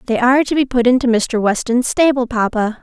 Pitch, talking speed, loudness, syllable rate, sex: 245 Hz, 210 wpm, -15 LUFS, 5.7 syllables/s, female